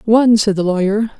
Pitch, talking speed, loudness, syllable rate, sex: 210 Hz, 200 wpm, -14 LUFS, 5.9 syllables/s, female